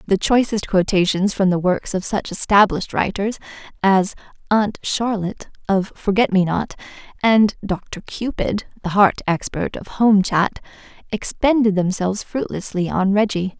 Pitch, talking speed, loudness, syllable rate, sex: 200 Hz, 135 wpm, -19 LUFS, 4.6 syllables/s, female